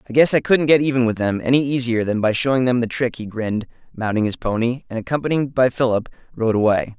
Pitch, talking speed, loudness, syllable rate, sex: 120 Hz, 230 wpm, -19 LUFS, 6.3 syllables/s, male